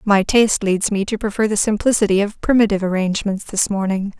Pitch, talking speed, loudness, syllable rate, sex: 205 Hz, 185 wpm, -18 LUFS, 6.1 syllables/s, female